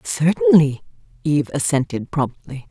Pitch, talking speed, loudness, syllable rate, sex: 145 Hz, 90 wpm, -19 LUFS, 4.6 syllables/s, female